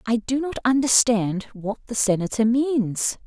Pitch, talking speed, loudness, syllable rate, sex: 235 Hz, 145 wpm, -22 LUFS, 4.2 syllables/s, female